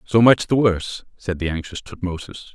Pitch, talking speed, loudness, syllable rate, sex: 95 Hz, 190 wpm, -20 LUFS, 5.4 syllables/s, male